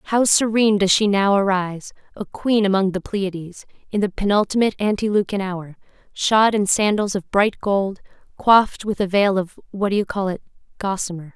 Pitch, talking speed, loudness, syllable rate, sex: 200 Hz, 175 wpm, -19 LUFS, 5.2 syllables/s, female